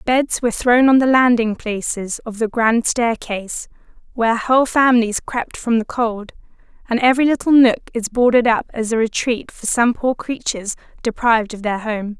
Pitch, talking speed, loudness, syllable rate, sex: 235 Hz, 175 wpm, -17 LUFS, 5.1 syllables/s, female